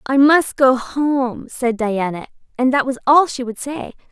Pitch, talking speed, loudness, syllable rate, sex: 260 Hz, 190 wpm, -17 LUFS, 4.1 syllables/s, female